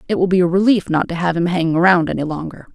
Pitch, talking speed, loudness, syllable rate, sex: 175 Hz, 285 wpm, -16 LUFS, 7.1 syllables/s, female